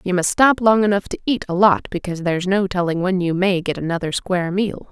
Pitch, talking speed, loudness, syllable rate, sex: 185 Hz, 245 wpm, -19 LUFS, 6.1 syllables/s, female